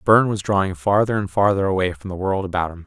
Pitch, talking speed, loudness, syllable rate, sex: 95 Hz, 250 wpm, -20 LUFS, 6.5 syllables/s, male